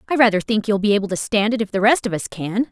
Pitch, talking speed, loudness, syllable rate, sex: 210 Hz, 330 wpm, -19 LUFS, 6.9 syllables/s, female